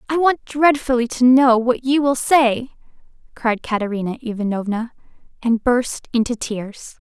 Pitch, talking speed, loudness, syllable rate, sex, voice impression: 245 Hz, 135 wpm, -18 LUFS, 4.5 syllables/s, female, feminine, adult-like, tensed, powerful, bright, clear, fluent, intellectual, slightly friendly, reassuring, elegant, lively, slightly intense